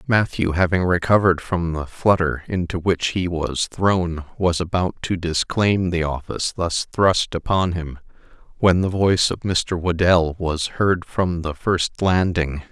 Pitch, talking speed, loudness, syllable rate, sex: 90 Hz, 155 wpm, -20 LUFS, 4.1 syllables/s, male